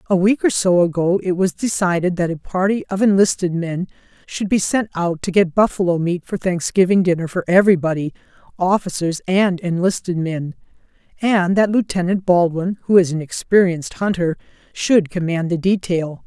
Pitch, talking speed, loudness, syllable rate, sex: 180 Hz, 155 wpm, -18 LUFS, 5.1 syllables/s, female